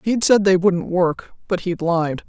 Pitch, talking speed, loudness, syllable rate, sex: 180 Hz, 210 wpm, -18 LUFS, 4.1 syllables/s, female